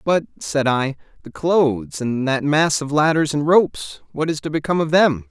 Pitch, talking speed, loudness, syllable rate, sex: 145 Hz, 205 wpm, -19 LUFS, 5.0 syllables/s, male